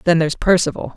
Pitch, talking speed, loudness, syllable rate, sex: 165 Hz, 190 wpm, -17 LUFS, 7.2 syllables/s, female